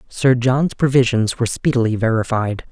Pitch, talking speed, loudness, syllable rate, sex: 120 Hz, 135 wpm, -17 LUFS, 5.2 syllables/s, male